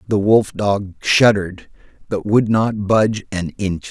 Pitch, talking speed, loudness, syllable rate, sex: 100 Hz, 155 wpm, -17 LUFS, 4.0 syllables/s, male